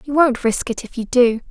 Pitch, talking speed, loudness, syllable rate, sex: 250 Hz, 280 wpm, -18 LUFS, 5.2 syllables/s, female